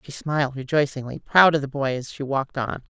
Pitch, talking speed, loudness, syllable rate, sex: 140 Hz, 225 wpm, -22 LUFS, 5.8 syllables/s, female